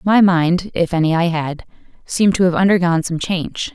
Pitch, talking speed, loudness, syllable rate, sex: 175 Hz, 190 wpm, -17 LUFS, 5.1 syllables/s, female